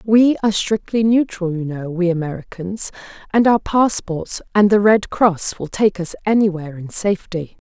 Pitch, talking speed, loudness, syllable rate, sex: 195 Hz, 165 wpm, -18 LUFS, 4.8 syllables/s, female